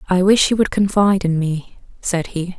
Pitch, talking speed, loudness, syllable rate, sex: 185 Hz, 210 wpm, -17 LUFS, 5.1 syllables/s, female